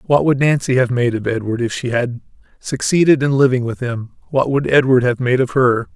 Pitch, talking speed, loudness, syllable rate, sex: 130 Hz, 220 wpm, -16 LUFS, 5.4 syllables/s, male